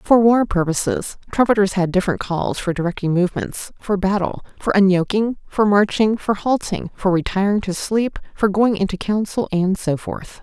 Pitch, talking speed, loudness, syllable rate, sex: 200 Hz, 160 wpm, -19 LUFS, 4.9 syllables/s, female